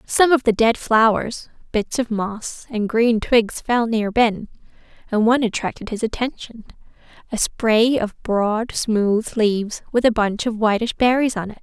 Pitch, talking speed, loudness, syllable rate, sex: 225 Hz, 165 wpm, -19 LUFS, 4.3 syllables/s, female